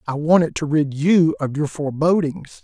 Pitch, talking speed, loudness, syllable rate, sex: 155 Hz, 180 wpm, -19 LUFS, 4.9 syllables/s, male